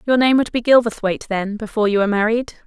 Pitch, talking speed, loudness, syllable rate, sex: 220 Hz, 225 wpm, -18 LUFS, 6.9 syllables/s, female